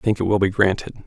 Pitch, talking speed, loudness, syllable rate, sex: 100 Hz, 335 wpm, -20 LUFS, 7.6 syllables/s, male